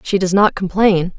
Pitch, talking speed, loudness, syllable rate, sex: 190 Hz, 205 wpm, -15 LUFS, 4.7 syllables/s, female